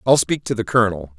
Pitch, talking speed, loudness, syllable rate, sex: 110 Hz, 255 wpm, -19 LUFS, 7.0 syllables/s, male